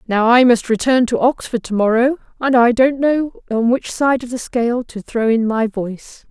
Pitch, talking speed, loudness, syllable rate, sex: 240 Hz, 220 wpm, -16 LUFS, 4.8 syllables/s, female